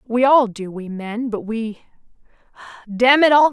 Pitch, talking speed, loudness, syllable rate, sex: 235 Hz, 155 wpm, -18 LUFS, 4.1 syllables/s, female